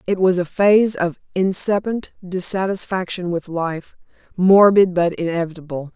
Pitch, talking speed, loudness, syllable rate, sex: 180 Hz, 120 wpm, -18 LUFS, 4.7 syllables/s, female